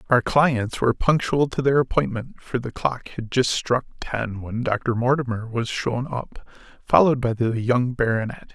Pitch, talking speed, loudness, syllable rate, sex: 120 Hz, 175 wpm, -22 LUFS, 4.6 syllables/s, male